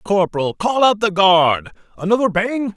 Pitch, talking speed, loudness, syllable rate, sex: 200 Hz, 150 wpm, -16 LUFS, 4.6 syllables/s, male